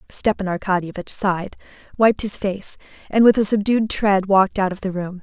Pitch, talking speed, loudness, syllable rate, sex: 195 Hz, 185 wpm, -19 LUFS, 5.3 syllables/s, female